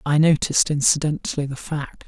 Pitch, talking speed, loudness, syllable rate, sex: 145 Hz, 145 wpm, -20 LUFS, 5.6 syllables/s, male